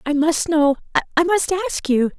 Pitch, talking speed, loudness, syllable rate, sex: 315 Hz, 190 wpm, -19 LUFS, 4.8 syllables/s, female